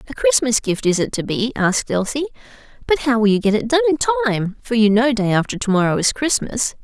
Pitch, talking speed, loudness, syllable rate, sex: 240 Hz, 235 wpm, -18 LUFS, 5.9 syllables/s, female